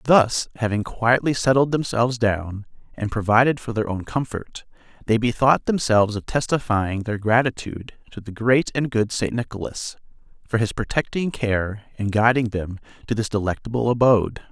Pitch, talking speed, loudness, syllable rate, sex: 115 Hz, 155 wpm, -21 LUFS, 5.1 syllables/s, male